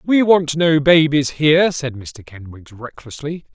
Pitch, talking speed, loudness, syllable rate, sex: 150 Hz, 150 wpm, -15 LUFS, 4.1 syllables/s, male